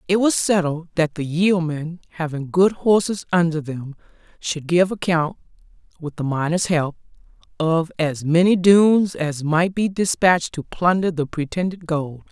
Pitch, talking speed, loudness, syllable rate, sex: 170 Hz, 150 wpm, -20 LUFS, 4.3 syllables/s, female